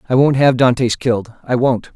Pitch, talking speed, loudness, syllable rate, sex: 125 Hz, 185 wpm, -15 LUFS, 5.3 syllables/s, male